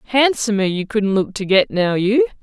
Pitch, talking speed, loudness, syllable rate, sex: 215 Hz, 200 wpm, -17 LUFS, 5.0 syllables/s, female